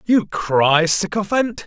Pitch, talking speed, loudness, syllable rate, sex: 190 Hz, 110 wpm, -17 LUFS, 3.3 syllables/s, male